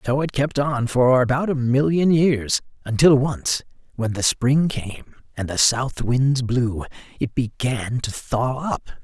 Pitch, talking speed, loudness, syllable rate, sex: 130 Hz, 165 wpm, -21 LUFS, 3.7 syllables/s, male